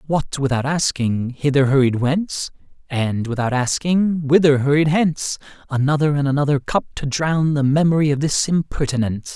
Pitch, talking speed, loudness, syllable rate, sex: 145 Hz, 145 wpm, -19 LUFS, 5.1 syllables/s, male